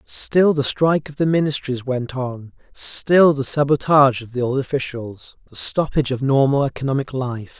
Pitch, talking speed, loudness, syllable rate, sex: 135 Hz, 165 wpm, -19 LUFS, 4.9 syllables/s, male